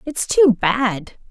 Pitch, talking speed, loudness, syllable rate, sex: 235 Hz, 140 wpm, -17 LUFS, 2.8 syllables/s, female